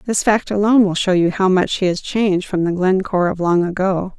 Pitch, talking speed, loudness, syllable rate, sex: 190 Hz, 245 wpm, -17 LUFS, 5.7 syllables/s, female